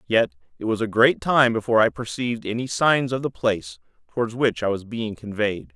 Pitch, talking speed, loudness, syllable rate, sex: 110 Hz, 210 wpm, -22 LUFS, 5.6 syllables/s, male